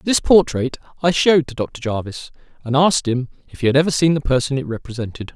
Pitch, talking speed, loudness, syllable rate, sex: 140 Hz, 215 wpm, -18 LUFS, 6.2 syllables/s, male